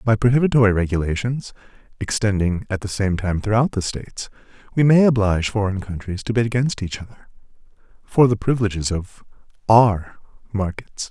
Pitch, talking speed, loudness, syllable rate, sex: 105 Hz, 145 wpm, -20 LUFS, 5.6 syllables/s, male